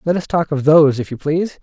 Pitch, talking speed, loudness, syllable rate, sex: 155 Hz, 295 wpm, -16 LUFS, 6.7 syllables/s, male